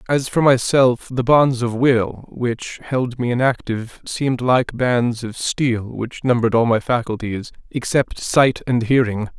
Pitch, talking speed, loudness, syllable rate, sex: 120 Hz, 160 wpm, -19 LUFS, 4.0 syllables/s, male